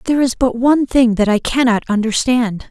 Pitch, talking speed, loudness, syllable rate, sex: 240 Hz, 200 wpm, -15 LUFS, 5.7 syllables/s, female